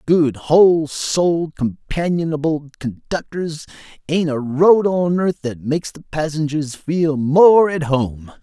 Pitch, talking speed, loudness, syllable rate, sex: 155 Hz, 130 wpm, -18 LUFS, 3.8 syllables/s, male